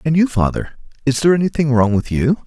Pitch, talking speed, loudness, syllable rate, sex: 140 Hz, 195 wpm, -17 LUFS, 6.2 syllables/s, male